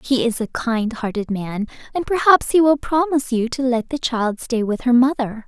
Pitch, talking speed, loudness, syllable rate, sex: 250 Hz, 220 wpm, -19 LUFS, 4.9 syllables/s, female